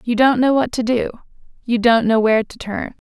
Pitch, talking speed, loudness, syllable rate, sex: 235 Hz, 215 wpm, -17 LUFS, 5.3 syllables/s, female